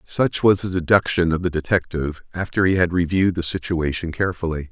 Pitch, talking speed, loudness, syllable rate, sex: 85 Hz, 180 wpm, -21 LUFS, 6.0 syllables/s, male